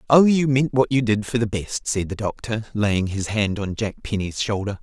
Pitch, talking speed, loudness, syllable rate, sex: 110 Hz, 235 wpm, -22 LUFS, 4.8 syllables/s, male